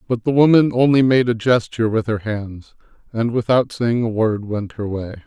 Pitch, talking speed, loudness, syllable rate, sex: 115 Hz, 205 wpm, -18 LUFS, 5.0 syllables/s, male